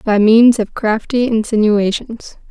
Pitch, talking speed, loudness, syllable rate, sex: 220 Hz, 120 wpm, -14 LUFS, 3.9 syllables/s, female